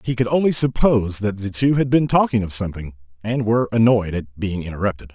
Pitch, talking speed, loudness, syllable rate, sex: 110 Hz, 210 wpm, -19 LUFS, 6.1 syllables/s, male